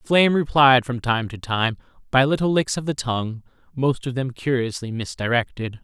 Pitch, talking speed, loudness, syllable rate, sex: 130 Hz, 175 wpm, -21 LUFS, 5.1 syllables/s, male